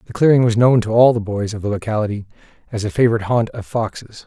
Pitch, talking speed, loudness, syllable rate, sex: 110 Hz, 240 wpm, -17 LUFS, 6.8 syllables/s, male